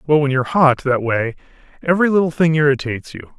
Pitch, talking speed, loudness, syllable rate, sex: 145 Hz, 215 wpm, -17 LUFS, 6.6 syllables/s, male